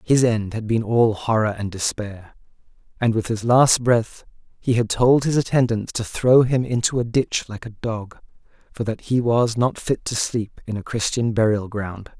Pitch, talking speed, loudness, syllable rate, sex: 115 Hz, 195 wpm, -21 LUFS, 4.5 syllables/s, male